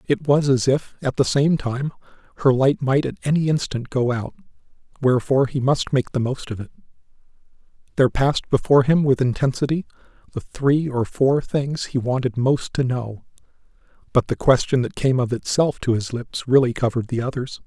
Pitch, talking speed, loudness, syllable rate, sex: 130 Hz, 185 wpm, -21 LUFS, 5.3 syllables/s, male